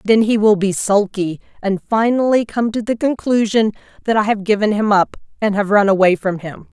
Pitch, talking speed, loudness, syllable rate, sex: 210 Hz, 205 wpm, -16 LUFS, 5.2 syllables/s, female